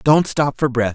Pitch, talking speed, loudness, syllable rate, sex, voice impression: 135 Hz, 255 wpm, -18 LUFS, 4.4 syllables/s, male, masculine, adult-like, slightly fluent, refreshing, sincere